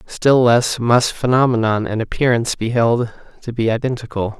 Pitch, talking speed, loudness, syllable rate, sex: 120 Hz, 150 wpm, -17 LUFS, 4.8 syllables/s, male